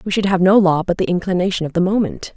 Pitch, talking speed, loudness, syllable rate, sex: 185 Hz, 280 wpm, -17 LUFS, 6.8 syllables/s, female